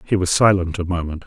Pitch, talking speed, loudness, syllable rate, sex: 90 Hz, 240 wpm, -18 LUFS, 6.2 syllables/s, male